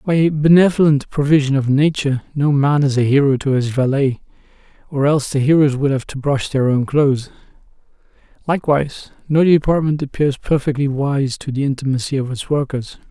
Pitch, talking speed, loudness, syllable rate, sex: 140 Hz, 170 wpm, -17 LUFS, 5.6 syllables/s, male